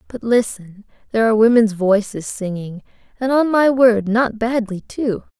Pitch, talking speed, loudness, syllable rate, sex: 225 Hz, 155 wpm, -17 LUFS, 4.7 syllables/s, female